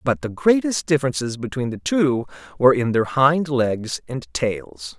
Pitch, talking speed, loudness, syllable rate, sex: 130 Hz, 170 wpm, -20 LUFS, 4.4 syllables/s, male